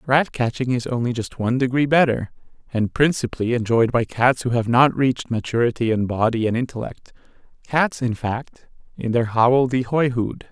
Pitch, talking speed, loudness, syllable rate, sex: 120 Hz, 170 wpm, -20 LUFS, 5.2 syllables/s, male